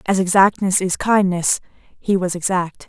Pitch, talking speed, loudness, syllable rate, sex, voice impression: 185 Hz, 145 wpm, -18 LUFS, 4.2 syllables/s, female, very feminine, slightly middle-aged, thin, slightly tensed, slightly powerful, slightly dark, hard, very clear, fluent, slightly raspy, slightly cool, intellectual, refreshing, very sincere, slightly calm, slightly friendly, reassuring, unique, elegant, slightly wild, sweet, lively, strict, slightly intense, sharp, slightly light